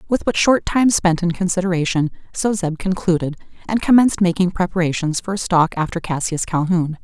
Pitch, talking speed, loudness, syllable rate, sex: 180 Hz, 170 wpm, -18 LUFS, 5.5 syllables/s, female